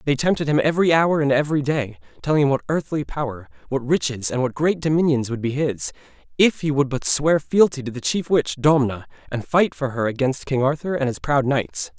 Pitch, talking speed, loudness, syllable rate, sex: 140 Hz, 220 wpm, -21 LUFS, 5.6 syllables/s, male